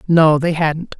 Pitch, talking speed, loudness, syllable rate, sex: 160 Hz, 180 wpm, -15 LUFS, 3.6 syllables/s, male